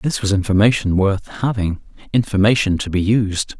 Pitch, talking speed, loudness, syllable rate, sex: 100 Hz, 135 wpm, -18 LUFS, 5.0 syllables/s, male